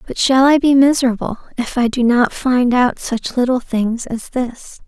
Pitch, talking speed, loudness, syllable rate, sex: 250 Hz, 195 wpm, -16 LUFS, 4.4 syllables/s, female